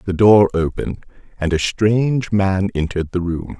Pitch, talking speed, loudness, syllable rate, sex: 95 Hz, 165 wpm, -18 LUFS, 5.1 syllables/s, male